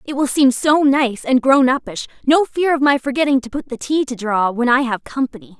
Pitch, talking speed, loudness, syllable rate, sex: 265 Hz, 245 wpm, -17 LUFS, 5.4 syllables/s, female